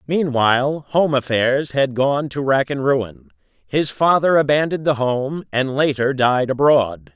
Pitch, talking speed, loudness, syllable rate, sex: 140 Hz, 150 wpm, -18 LUFS, 4.1 syllables/s, male